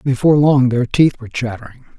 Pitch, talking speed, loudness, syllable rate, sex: 125 Hz, 180 wpm, -15 LUFS, 6.2 syllables/s, male